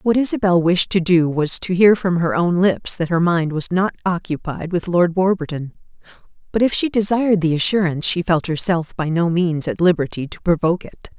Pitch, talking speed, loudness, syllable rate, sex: 175 Hz, 205 wpm, -18 LUFS, 5.3 syllables/s, female